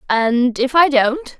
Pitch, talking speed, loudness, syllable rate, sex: 265 Hz, 170 wpm, -15 LUFS, 3.3 syllables/s, female